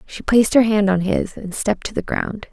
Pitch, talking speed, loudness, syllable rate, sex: 205 Hz, 260 wpm, -19 LUFS, 5.6 syllables/s, female